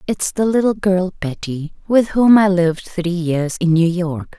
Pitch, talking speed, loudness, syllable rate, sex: 180 Hz, 190 wpm, -17 LUFS, 4.3 syllables/s, female